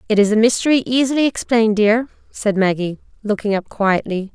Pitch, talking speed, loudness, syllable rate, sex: 220 Hz, 165 wpm, -17 LUFS, 5.7 syllables/s, female